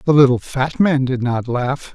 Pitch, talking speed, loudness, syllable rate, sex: 135 Hz, 215 wpm, -17 LUFS, 4.4 syllables/s, male